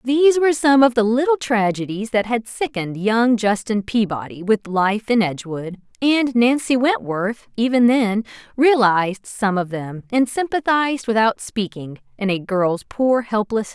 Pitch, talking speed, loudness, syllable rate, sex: 225 Hz, 155 wpm, -19 LUFS, 4.6 syllables/s, female